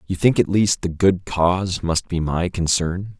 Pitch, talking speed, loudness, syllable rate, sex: 90 Hz, 205 wpm, -20 LUFS, 4.3 syllables/s, male